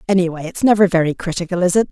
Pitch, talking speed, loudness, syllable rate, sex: 180 Hz, 220 wpm, -17 LUFS, 7.4 syllables/s, female